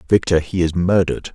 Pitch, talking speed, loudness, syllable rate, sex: 85 Hz, 180 wpm, -18 LUFS, 6.1 syllables/s, male